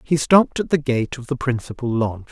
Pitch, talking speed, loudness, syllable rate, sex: 130 Hz, 235 wpm, -20 LUFS, 6.1 syllables/s, male